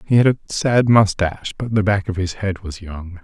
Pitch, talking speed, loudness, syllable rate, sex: 100 Hz, 240 wpm, -18 LUFS, 5.0 syllables/s, male